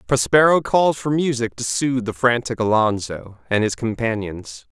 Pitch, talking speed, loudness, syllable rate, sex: 120 Hz, 150 wpm, -19 LUFS, 4.7 syllables/s, male